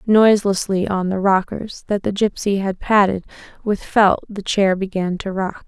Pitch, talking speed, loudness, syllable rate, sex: 195 Hz, 170 wpm, -19 LUFS, 4.5 syllables/s, female